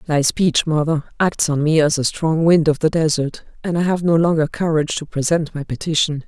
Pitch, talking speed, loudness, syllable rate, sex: 155 Hz, 220 wpm, -18 LUFS, 5.4 syllables/s, female